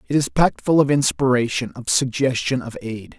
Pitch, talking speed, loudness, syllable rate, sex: 130 Hz, 190 wpm, -20 LUFS, 5.5 syllables/s, male